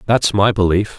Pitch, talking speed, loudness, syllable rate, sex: 100 Hz, 185 wpm, -15 LUFS, 4.8 syllables/s, male